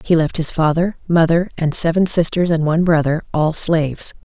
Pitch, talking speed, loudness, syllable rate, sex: 165 Hz, 180 wpm, -16 LUFS, 5.2 syllables/s, female